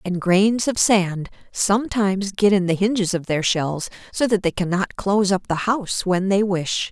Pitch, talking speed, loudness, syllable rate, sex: 195 Hz, 200 wpm, -20 LUFS, 4.7 syllables/s, female